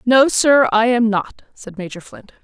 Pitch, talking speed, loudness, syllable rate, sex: 230 Hz, 195 wpm, -14 LUFS, 4.3 syllables/s, female